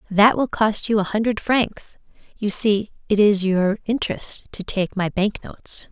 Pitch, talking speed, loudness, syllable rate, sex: 205 Hz, 185 wpm, -20 LUFS, 4.4 syllables/s, female